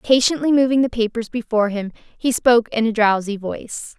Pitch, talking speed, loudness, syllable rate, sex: 230 Hz, 180 wpm, -19 LUFS, 5.9 syllables/s, female